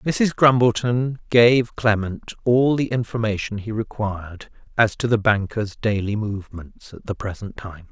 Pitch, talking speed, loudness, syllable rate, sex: 110 Hz, 145 wpm, -21 LUFS, 4.4 syllables/s, male